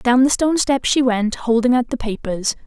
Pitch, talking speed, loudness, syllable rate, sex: 245 Hz, 225 wpm, -18 LUFS, 5.2 syllables/s, female